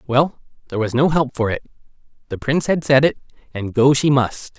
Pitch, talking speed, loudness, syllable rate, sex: 135 Hz, 210 wpm, -18 LUFS, 5.8 syllables/s, male